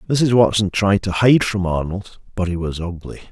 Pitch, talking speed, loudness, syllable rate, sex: 100 Hz, 200 wpm, -18 LUFS, 4.8 syllables/s, male